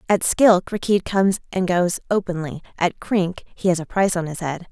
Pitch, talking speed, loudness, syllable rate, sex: 180 Hz, 205 wpm, -21 LUFS, 5.1 syllables/s, female